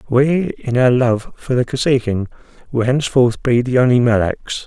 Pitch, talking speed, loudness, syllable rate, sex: 125 Hz, 165 wpm, -16 LUFS, 4.7 syllables/s, male